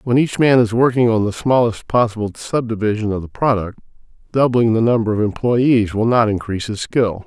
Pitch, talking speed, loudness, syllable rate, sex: 115 Hz, 190 wpm, -17 LUFS, 5.4 syllables/s, male